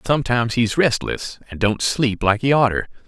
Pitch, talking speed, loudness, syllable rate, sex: 120 Hz, 175 wpm, -19 LUFS, 5.2 syllables/s, male